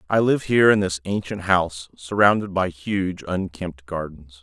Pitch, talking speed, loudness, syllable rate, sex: 90 Hz, 165 wpm, -21 LUFS, 4.6 syllables/s, male